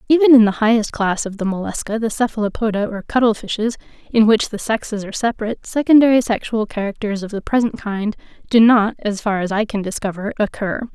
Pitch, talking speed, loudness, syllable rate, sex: 215 Hz, 190 wpm, -18 LUFS, 6.1 syllables/s, female